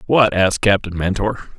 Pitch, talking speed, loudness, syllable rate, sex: 100 Hz, 150 wpm, -17 LUFS, 5.2 syllables/s, male